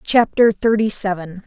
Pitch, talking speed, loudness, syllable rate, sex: 205 Hz, 125 wpm, -17 LUFS, 4.4 syllables/s, female